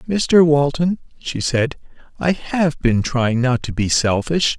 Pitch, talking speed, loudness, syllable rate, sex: 145 Hz, 155 wpm, -18 LUFS, 3.7 syllables/s, male